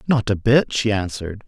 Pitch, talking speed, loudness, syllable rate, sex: 110 Hz, 205 wpm, -20 LUFS, 5.3 syllables/s, male